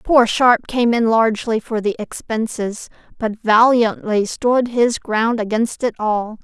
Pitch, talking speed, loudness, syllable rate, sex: 225 Hz, 150 wpm, -17 LUFS, 3.8 syllables/s, female